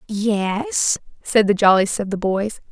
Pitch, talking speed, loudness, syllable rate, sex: 210 Hz, 155 wpm, -19 LUFS, 3.6 syllables/s, female